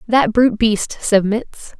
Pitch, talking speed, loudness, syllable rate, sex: 220 Hz, 135 wpm, -16 LUFS, 3.7 syllables/s, female